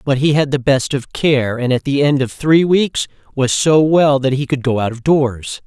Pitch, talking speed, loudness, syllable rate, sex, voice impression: 140 Hz, 255 wpm, -15 LUFS, 4.6 syllables/s, male, masculine, adult-like, slightly fluent, refreshing, slightly sincere, slightly unique